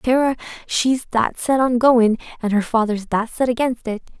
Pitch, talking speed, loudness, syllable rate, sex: 240 Hz, 185 wpm, -19 LUFS, 4.3 syllables/s, female